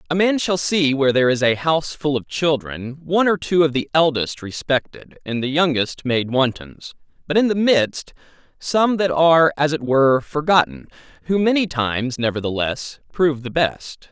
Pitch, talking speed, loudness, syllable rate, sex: 145 Hz, 180 wpm, -19 LUFS, 5.0 syllables/s, male